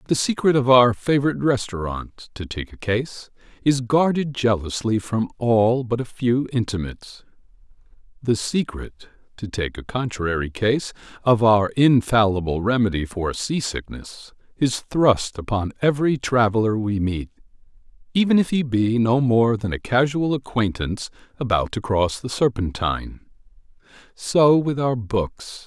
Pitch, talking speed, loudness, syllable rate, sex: 115 Hz, 135 wpm, -21 LUFS, 4.5 syllables/s, male